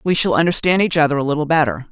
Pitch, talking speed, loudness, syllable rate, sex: 155 Hz, 250 wpm, -16 LUFS, 7.2 syllables/s, female